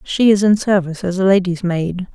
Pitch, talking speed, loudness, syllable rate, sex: 190 Hz, 225 wpm, -16 LUFS, 5.5 syllables/s, female